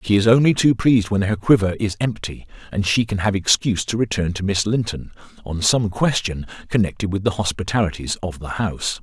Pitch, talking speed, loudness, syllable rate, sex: 100 Hz, 200 wpm, -20 LUFS, 5.7 syllables/s, male